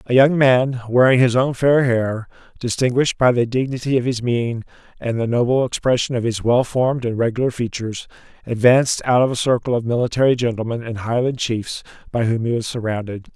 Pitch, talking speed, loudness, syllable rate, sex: 120 Hz, 190 wpm, -19 LUFS, 5.7 syllables/s, male